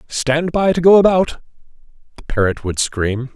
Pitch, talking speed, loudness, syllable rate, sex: 145 Hz, 160 wpm, -16 LUFS, 4.6 syllables/s, male